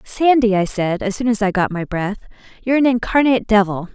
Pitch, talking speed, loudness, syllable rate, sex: 215 Hz, 215 wpm, -17 LUFS, 5.8 syllables/s, female